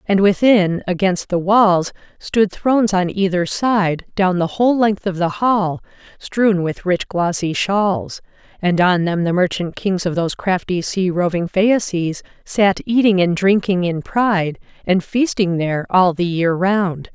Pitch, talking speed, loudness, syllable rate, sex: 185 Hz, 165 wpm, -17 LUFS, 4.1 syllables/s, female